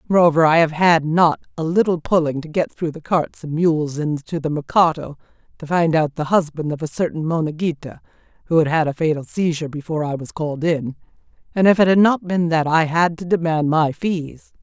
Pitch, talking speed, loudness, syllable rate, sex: 160 Hz, 215 wpm, -19 LUFS, 5.5 syllables/s, female